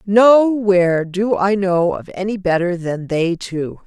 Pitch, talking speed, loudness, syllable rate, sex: 190 Hz, 155 wpm, -17 LUFS, 3.7 syllables/s, female